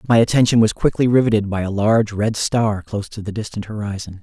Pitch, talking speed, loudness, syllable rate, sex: 105 Hz, 215 wpm, -18 LUFS, 6.2 syllables/s, male